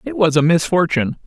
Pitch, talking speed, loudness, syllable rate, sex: 165 Hz, 190 wpm, -16 LUFS, 6.3 syllables/s, male